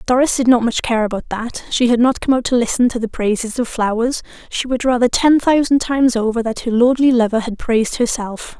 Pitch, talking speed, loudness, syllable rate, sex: 240 Hz, 225 wpm, -16 LUFS, 5.7 syllables/s, female